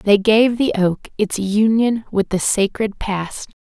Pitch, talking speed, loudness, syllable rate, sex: 210 Hz, 165 wpm, -18 LUFS, 3.7 syllables/s, female